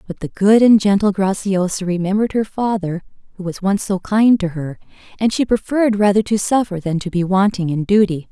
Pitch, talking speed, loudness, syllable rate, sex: 195 Hz, 200 wpm, -17 LUFS, 5.5 syllables/s, female